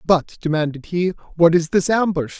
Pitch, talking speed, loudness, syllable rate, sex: 170 Hz, 175 wpm, -19 LUFS, 5.0 syllables/s, male